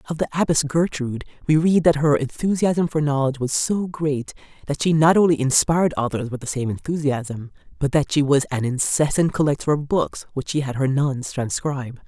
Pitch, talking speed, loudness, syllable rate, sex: 145 Hz, 195 wpm, -21 LUFS, 5.4 syllables/s, female